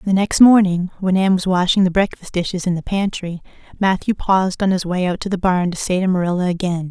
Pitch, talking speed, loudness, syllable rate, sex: 185 Hz, 235 wpm, -17 LUFS, 6.0 syllables/s, female